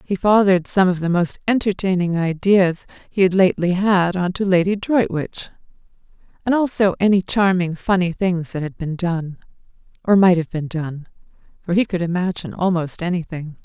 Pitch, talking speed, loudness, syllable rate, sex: 180 Hz, 160 wpm, -19 LUFS, 5.2 syllables/s, female